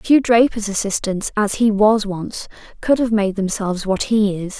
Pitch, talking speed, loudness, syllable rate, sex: 210 Hz, 185 wpm, -18 LUFS, 4.5 syllables/s, female